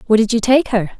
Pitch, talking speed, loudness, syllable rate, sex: 225 Hz, 300 wpm, -15 LUFS, 6.5 syllables/s, female